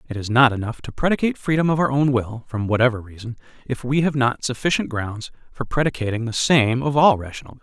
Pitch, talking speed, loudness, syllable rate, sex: 125 Hz, 220 wpm, -20 LUFS, 6.2 syllables/s, male